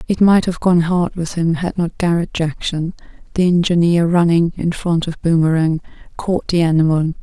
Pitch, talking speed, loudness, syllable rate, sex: 170 Hz, 175 wpm, -16 LUFS, 4.9 syllables/s, female